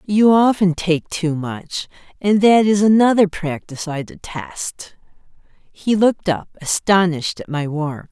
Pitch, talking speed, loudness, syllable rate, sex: 185 Hz, 140 wpm, -18 LUFS, 4.2 syllables/s, female